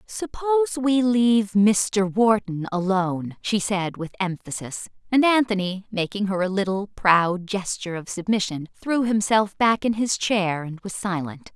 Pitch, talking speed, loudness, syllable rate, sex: 200 Hz, 150 wpm, -23 LUFS, 4.4 syllables/s, female